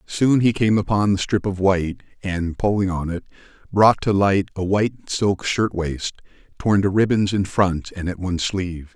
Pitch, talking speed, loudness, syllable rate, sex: 95 Hz, 190 wpm, -20 LUFS, 4.8 syllables/s, male